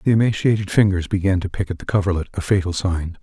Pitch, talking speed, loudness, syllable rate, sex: 95 Hz, 225 wpm, -20 LUFS, 6.6 syllables/s, male